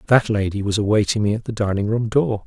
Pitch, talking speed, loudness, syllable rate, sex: 110 Hz, 245 wpm, -20 LUFS, 6.2 syllables/s, male